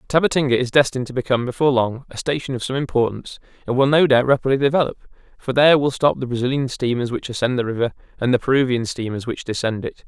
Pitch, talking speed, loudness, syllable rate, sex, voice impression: 130 Hz, 215 wpm, -19 LUFS, 7.0 syllables/s, male, masculine, slightly young, tensed, bright, clear, fluent, slightly cool, refreshing, sincere, friendly, unique, kind, slightly modest